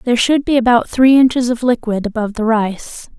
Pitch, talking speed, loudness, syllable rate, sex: 235 Hz, 205 wpm, -14 LUFS, 5.6 syllables/s, female